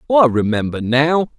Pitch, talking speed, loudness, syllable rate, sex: 140 Hz, 130 wpm, -16 LUFS, 5.5 syllables/s, male